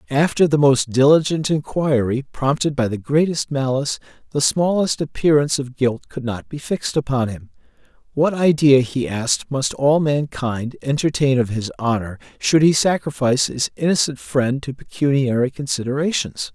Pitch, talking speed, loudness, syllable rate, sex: 140 Hz, 150 wpm, -19 LUFS, 5.0 syllables/s, male